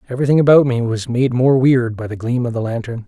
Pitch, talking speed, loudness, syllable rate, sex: 125 Hz, 255 wpm, -16 LUFS, 6.3 syllables/s, male